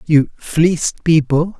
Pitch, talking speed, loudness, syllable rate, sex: 160 Hz, 115 wpm, -16 LUFS, 3.7 syllables/s, male